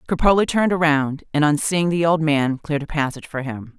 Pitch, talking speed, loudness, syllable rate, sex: 155 Hz, 220 wpm, -20 LUFS, 5.9 syllables/s, female